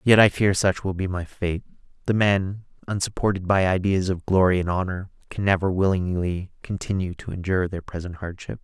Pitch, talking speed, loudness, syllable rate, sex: 95 Hz, 180 wpm, -23 LUFS, 5.4 syllables/s, male